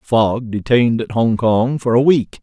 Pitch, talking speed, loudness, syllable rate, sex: 115 Hz, 200 wpm, -16 LUFS, 4.3 syllables/s, male